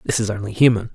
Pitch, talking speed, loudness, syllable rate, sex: 110 Hz, 255 wpm, -18 LUFS, 7.1 syllables/s, male